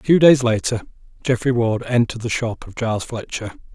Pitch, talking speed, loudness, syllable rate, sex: 115 Hz, 190 wpm, -20 LUFS, 5.8 syllables/s, male